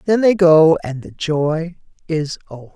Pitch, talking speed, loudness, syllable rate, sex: 160 Hz, 175 wpm, -16 LUFS, 4.0 syllables/s, female